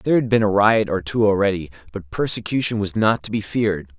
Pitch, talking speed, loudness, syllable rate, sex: 105 Hz, 225 wpm, -20 LUFS, 6.0 syllables/s, male